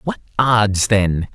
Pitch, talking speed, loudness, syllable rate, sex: 110 Hz, 135 wpm, -17 LUFS, 2.9 syllables/s, male